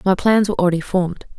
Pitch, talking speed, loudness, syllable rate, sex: 185 Hz, 215 wpm, -18 LUFS, 7.6 syllables/s, female